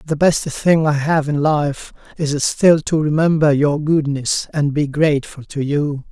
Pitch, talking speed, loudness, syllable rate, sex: 150 Hz, 175 wpm, -17 LUFS, 4.0 syllables/s, male